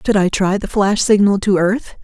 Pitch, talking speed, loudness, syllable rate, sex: 200 Hz, 235 wpm, -15 LUFS, 4.8 syllables/s, female